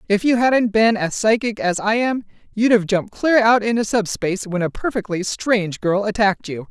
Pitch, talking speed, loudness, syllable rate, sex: 210 Hz, 195 wpm, -18 LUFS, 5.3 syllables/s, female